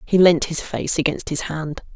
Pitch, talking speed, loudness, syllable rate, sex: 160 Hz, 215 wpm, -20 LUFS, 4.6 syllables/s, female